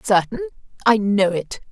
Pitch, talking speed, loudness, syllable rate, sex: 200 Hz, 105 wpm, -19 LUFS, 4.8 syllables/s, female